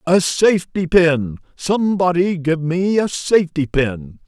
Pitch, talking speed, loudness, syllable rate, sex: 170 Hz, 125 wpm, -17 LUFS, 4.1 syllables/s, male